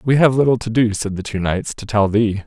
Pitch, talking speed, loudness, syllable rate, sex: 110 Hz, 295 wpm, -18 LUFS, 5.6 syllables/s, male